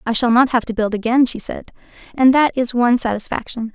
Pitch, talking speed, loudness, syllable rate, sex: 240 Hz, 225 wpm, -17 LUFS, 5.9 syllables/s, female